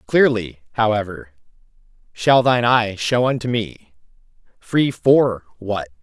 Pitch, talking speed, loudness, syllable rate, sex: 115 Hz, 110 wpm, -18 LUFS, 4.0 syllables/s, male